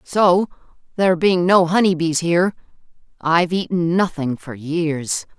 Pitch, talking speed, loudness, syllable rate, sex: 170 Hz, 135 wpm, -18 LUFS, 4.4 syllables/s, female